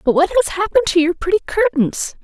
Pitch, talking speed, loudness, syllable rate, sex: 370 Hz, 215 wpm, -16 LUFS, 6.8 syllables/s, female